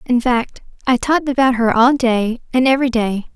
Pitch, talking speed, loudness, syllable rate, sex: 245 Hz, 195 wpm, -16 LUFS, 5.4 syllables/s, female